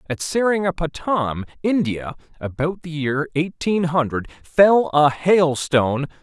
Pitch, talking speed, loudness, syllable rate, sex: 160 Hz, 105 wpm, -20 LUFS, 3.9 syllables/s, male